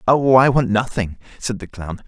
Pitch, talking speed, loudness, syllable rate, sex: 115 Hz, 200 wpm, -18 LUFS, 4.6 syllables/s, male